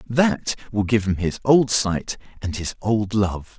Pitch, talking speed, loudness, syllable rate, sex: 105 Hz, 185 wpm, -21 LUFS, 3.7 syllables/s, male